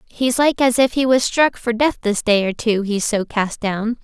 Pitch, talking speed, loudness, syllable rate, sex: 230 Hz, 240 wpm, -18 LUFS, 4.4 syllables/s, female